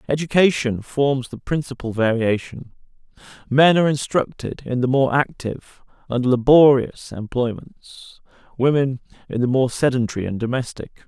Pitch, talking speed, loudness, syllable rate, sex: 130 Hz, 120 wpm, -20 LUFS, 4.8 syllables/s, male